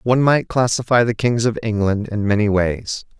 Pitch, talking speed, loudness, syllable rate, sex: 110 Hz, 190 wpm, -18 LUFS, 5.1 syllables/s, male